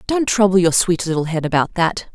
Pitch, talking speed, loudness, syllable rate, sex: 180 Hz, 225 wpm, -17 LUFS, 5.6 syllables/s, female